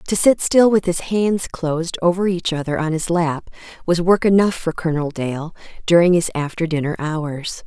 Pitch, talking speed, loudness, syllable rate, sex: 170 Hz, 190 wpm, -18 LUFS, 4.9 syllables/s, female